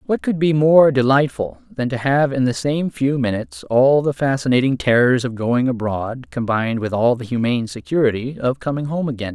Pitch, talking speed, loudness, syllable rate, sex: 130 Hz, 195 wpm, -18 LUFS, 5.3 syllables/s, male